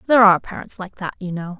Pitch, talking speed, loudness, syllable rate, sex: 195 Hz, 265 wpm, -18 LUFS, 7.6 syllables/s, female